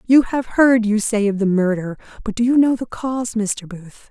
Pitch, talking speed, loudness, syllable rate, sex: 220 Hz, 235 wpm, -18 LUFS, 4.8 syllables/s, female